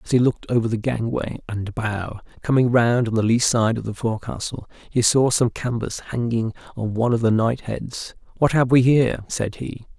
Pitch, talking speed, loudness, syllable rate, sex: 115 Hz, 200 wpm, -21 LUFS, 5.2 syllables/s, male